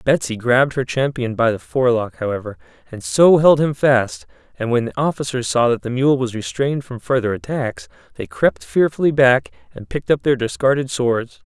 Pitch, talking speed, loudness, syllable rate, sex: 120 Hz, 190 wpm, -18 LUFS, 5.3 syllables/s, male